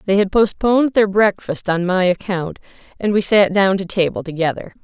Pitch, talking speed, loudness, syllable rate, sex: 190 Hz, 185 wpm, -17 LUFS, 5.2 syllables/s, female